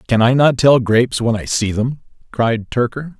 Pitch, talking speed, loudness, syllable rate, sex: 120 Hz, 205 wpm, -16 LUFS, 4.8 syllables/s, male